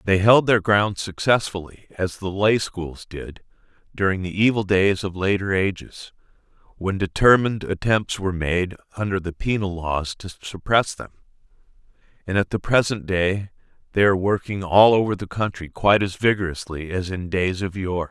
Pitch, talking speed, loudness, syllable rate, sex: 95 Hz, 155 wpm, -21 LUFS, 4.8 syllables/s, male